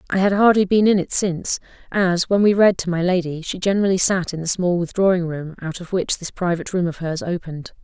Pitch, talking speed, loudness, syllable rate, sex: 180 Hz, 240 wpm, -19 LUFS, 6.0 syllables/s, female